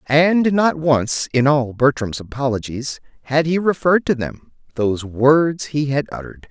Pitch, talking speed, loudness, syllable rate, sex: 140 Hz, 150 wpm, -18 LUFS, 4.5 syllables/s, male